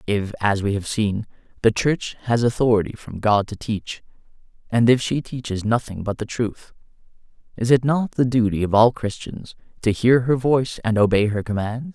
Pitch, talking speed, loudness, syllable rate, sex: 115 Hz, 185 wpm, -21 LUFS, 4.9 syllables/s, male